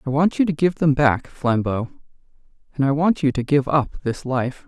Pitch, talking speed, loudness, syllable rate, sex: 140 Hz, 220 wpm, -20 LUFS, 4.9 syllables/s, male